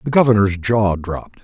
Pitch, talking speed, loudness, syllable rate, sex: 105 Hz, 165 wpm, -16 LUFS, 5.3 syllables/s, male